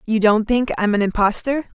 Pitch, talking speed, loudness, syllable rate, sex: 220 Hz, 200 wpm, -18 LUFS, 5.1 syllables/s, female